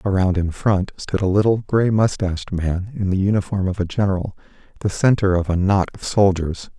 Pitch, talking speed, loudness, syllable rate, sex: 95 Hz, 195 wpm, -20 LUFS, 5.3 syllables/s, male